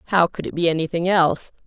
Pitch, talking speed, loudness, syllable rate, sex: 170 Hz, 215 wpm, -20 LUFS, 6.9 syllables/s, female